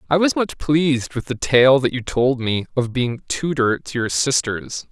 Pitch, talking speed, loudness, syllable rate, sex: 130 Hz, 205 wpm, -19 LUFS, 5.0 syllables/s, male